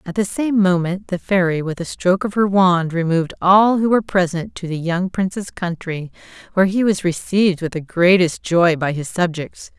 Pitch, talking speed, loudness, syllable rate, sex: 180 Hz, 200 wpm, -18 LUFS, 5.2 syllables/s, female